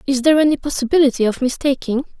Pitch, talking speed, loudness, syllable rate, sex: 270 Hz, 165 wpm, -17 LUFS, 7.3 syllables/s, female